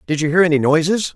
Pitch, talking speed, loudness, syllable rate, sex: 165 Hz, 260 wpm, -16 LUFS, 6.9 syllables/s, male